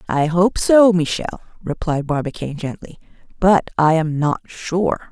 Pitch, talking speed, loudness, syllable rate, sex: 170 Hz, 140 wpm, -18 LUFS, 4.5 syllables/s, female